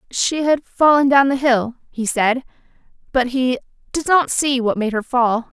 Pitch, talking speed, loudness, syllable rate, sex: 255 Hz, 185 wpm, -18 LUFS, 4.3 syllables/s, female